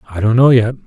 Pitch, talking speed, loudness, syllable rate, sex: 120 Hz, 275 wpm, -12 LUFS, 7.3 syllables/s, male